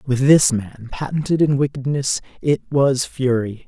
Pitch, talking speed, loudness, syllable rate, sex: 135 Hz, 145 wpm, -19 LUFS, 4.4 syllables/s, male